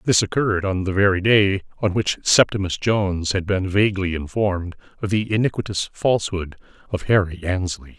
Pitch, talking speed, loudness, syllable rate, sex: 95 Hz, 160 wpm, -21 LUFS, 5.6 syllables/s, male